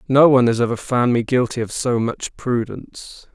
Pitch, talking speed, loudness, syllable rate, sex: 120 Hz, 195 wpm, -18 LUFS, 5.2 syllables/s, male